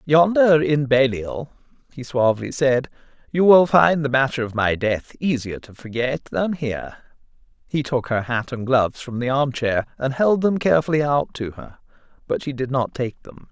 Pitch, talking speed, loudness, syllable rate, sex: 135 Hz, 185 wpm, -20 LUFS, 4.9 syllables/s, male